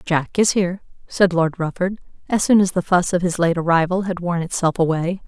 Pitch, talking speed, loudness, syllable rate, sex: 175 Hz, 215 wpm, -19 LUFS, 5.5 syllables/s, female